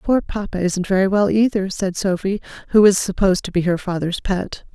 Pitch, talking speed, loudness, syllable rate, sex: 195 Hz, 200 wpm, -19 LUFS, 5.4 syllables/s, female